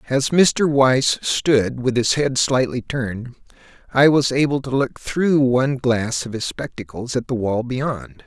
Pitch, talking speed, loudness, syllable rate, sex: 130 Hz, 175 wpm, -19 LUFS, 4.0 syllables/s, male